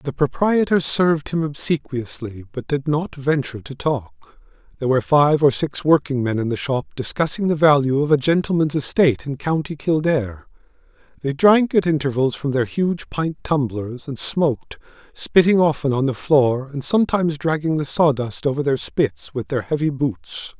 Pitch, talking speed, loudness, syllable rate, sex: 145 Hz, 170 wpm, -20 LUFS, 5.1 syllables/s, male